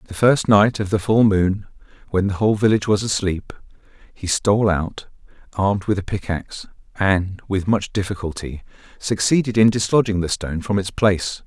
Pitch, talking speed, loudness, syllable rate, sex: 100 Hz, 165 wpm, -19 LUFS, 5.4 syllables/s, male